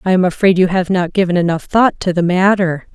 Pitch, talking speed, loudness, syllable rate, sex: 180 Hz, 245 wpm, -14 LUFS, 5.7 syllables/s, female